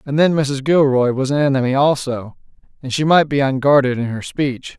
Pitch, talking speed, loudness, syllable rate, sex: 135 Hz, 200 wpm, -17 LUFS, 5.2 syllables/s, male